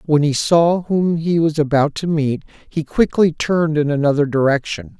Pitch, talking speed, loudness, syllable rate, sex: 155 Hz, 180 wpm, -17 LUFS, 4.7 syllables/s, male